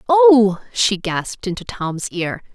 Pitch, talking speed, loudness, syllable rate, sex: 215 Hz, 140 wpm, -18 LUFS, 3.7 syllables/s, female